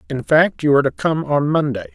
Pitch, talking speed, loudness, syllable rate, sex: 150 Hz, 245 wpm, -17 LUFS, 5.9 syllables/s, male